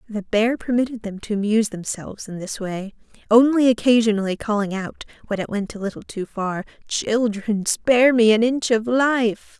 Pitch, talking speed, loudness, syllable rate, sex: 220 Hz, 175 wpm, -20 LUFS, 5.0 syllables/s, female